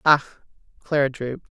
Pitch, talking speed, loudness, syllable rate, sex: 140 Hz, 115 wpm, -23 LUFS, 5.0 syllables/s, female